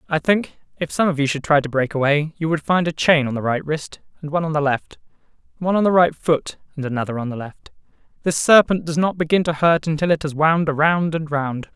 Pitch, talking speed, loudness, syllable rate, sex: 155 Hz, 250 wpm, -19 LUFS, 5.9 syllables/s, male